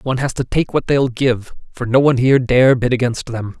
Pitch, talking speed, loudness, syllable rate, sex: 125 Hz, 250 wpm, -16 LUFS, 5.8 syllables/s, male